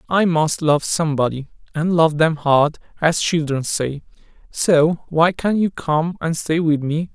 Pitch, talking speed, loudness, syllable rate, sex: 160 Hz, 170 wpm, -18 LUFS, 4.0 syllables/s, male